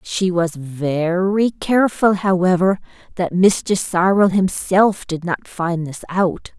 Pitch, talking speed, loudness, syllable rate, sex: 185 Hz, 125 wpm, -18 LUFS, 3.5 syllables/s, female